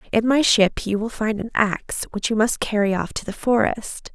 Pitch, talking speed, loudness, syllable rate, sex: 220 Hz, 230 wpm, -21 LUFS, 5.0 syllables/s, female